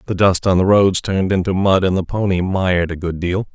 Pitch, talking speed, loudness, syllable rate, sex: 95 Hz, 255 wpm, -17 LUFS, 5.7 syllables/s, male